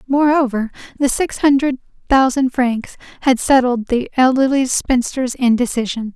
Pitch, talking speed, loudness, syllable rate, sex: 255 Hz, 115 wpm, -16 LUFS, 4.6 syllables/s, female